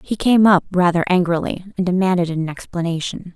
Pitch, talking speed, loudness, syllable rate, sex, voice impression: 180 Hz, 160 wpm, -18 LUFS, 5.6 syllables/s, female, feminine, adult-like, tensed, powerful, slightly bright, clear, fluent, intellectual, friendly, elegant, lively, slightly strict, slightly sharp